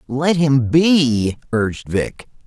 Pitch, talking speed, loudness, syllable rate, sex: 135 Hz, 120 wpm, -17 LUFS, 3.0 syllables/s, male